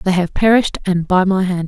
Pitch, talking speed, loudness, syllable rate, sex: 185 Hz, 250 wpm, -15 LUFS, 5.6 syllables/s, female